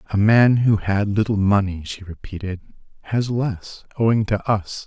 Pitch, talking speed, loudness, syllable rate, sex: 105 Hz, 160 wpm, -20 LUFS, 4.4 syllables/s, male